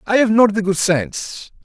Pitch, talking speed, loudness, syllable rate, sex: 195 Hz, 220 wpm, -16 LUFS, 5.0 syllables/s, male